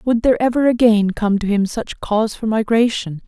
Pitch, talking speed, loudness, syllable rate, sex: 220 Hz, 200 wpm, -17 LUFS, 5.4 syllables/s, female